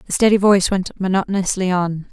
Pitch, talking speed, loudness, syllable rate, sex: 190 Hz, 170 wpm, -17 LUFS, 6.2 syllables/s, female